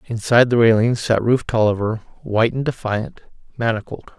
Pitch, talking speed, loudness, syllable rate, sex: 115 Hz, 130 wpm, -18 LUFS, 5.9 syllables/s, male